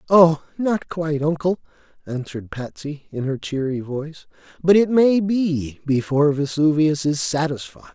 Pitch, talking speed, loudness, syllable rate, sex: 155 Hz, 135 wpm, -21 LUFS, 4.7 syllables/s, male